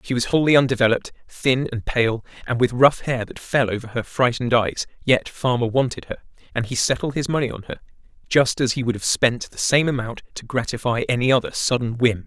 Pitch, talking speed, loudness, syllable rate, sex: 125 Hz, 205 wpm, -21 LUFS, 5.7 syllables/s, male